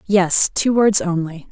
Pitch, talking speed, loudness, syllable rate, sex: 190 Hz, 160 wpm, -16 LUFS, 3.7 syllables/s, female